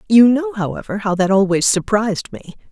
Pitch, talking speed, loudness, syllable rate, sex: 205 Hz, 175 wpm, -16 LUFS, 5.5 syllables/s, female